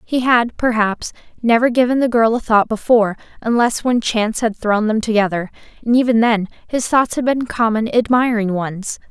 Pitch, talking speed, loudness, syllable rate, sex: 230 Hz, 180 wpm, -16 LUFS, 5.1 syllables/s, female